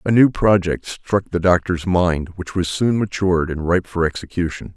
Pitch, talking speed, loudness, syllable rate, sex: 90 Hz, 190 wpm, -19 LUFS, 4.8 syllables/s, male